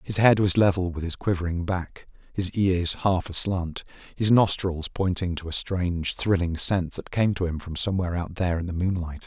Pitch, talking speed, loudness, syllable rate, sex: 90 Hz, 200 wpm, -25 LUFS, 5.2 syllables/s, male